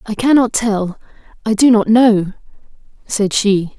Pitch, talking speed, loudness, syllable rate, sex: 215 Hz, 145 wpm, -14 LUFS, 4.2 syllables/s, female